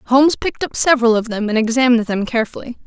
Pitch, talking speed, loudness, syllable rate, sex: 240 Hz, 210 wpm, -16 LUFS, 7.2 syllables/s, female